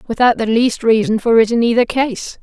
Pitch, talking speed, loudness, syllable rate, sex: 230 Hz, 220 wpm, -14 LUFS, 5.3 syllables/s, female